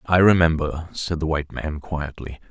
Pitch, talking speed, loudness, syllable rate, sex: 80 Hz, 170 wpm, -22 LUFS, 4.9 syllables/s, male